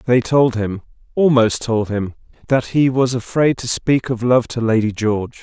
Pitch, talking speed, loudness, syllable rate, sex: 120 Hz, 165 wpm, -17 LUFS, 4.6 syllables/s, male